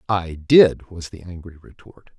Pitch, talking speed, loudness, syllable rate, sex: 90 Hz, 165 wpm, -16 LUFS, 4.3 syllables/s, male